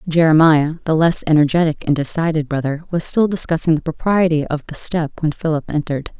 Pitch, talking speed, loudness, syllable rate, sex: 160 Hz, 175 wpm, -17 LUFS, 5.6 syllables/s, female